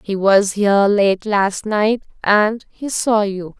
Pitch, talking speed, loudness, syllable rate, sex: 205 Hz, 165 wpm, -16 LUFS, 3.4 syllables/s, female